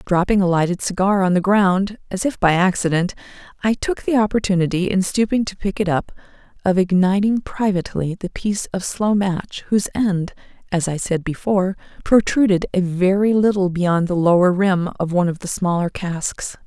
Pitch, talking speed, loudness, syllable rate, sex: 190 Hz, 175 wpm, -19 LUFS, 5.2 syllables/s, female